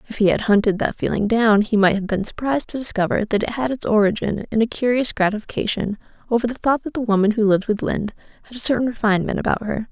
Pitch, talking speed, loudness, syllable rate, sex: 220 Hz, 235 wpm, -20 LUFS, 6.7 syllables/s, female